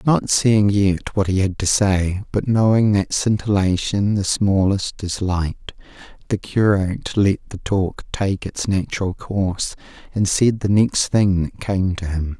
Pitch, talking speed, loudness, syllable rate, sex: 100 Hz, 165 wpm, -19 LUFS, 3.9 syllables/s, male